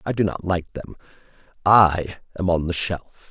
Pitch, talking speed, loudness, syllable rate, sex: 90 Hz, 180 wpm, -21 LUFS, 5.3 syllables/s, male